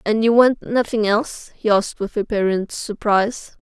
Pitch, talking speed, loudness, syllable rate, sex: 215 Hz, 165 wpm, -19 LUFS, 4.9 syllables/s, female